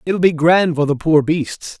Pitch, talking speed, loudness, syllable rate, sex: 160 Hz, 235 wpm, -15 LUFS, 4.2 syllables/s, male